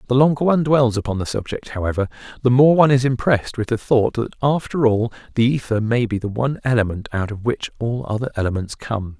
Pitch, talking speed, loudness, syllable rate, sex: 120 Hz, 215 wpm, -19 LUFS, 6.2 syllables/s, male